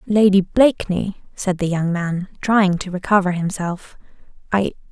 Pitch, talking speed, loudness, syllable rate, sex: 190 Hz, 135 wpm, -19 LUFS, 4.4 syllables/s, female